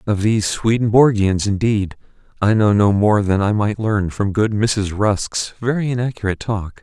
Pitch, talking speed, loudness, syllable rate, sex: 105 Hz, 165 wpm, -17 LUFS, 4.7 syllables/s, male